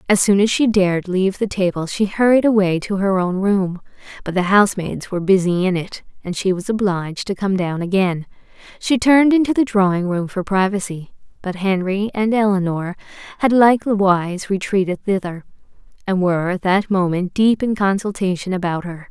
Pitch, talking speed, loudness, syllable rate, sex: 195 Hz, 175 wpm, -18 LUFS, 5.4 syllables/s, female